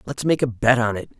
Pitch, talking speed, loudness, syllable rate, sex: 120 Hz, 300 wpm, -20 LUFS, 6.1 syllables/s, male